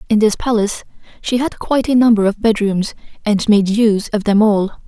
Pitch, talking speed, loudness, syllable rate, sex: 215 Hz, 195 wpm, -15 LUFS, 5.7 syllables/s, female